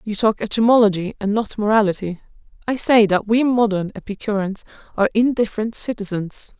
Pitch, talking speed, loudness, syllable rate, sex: 210 Hz, 135 wpm, -19 LUFS, 5.7 syllables/s, female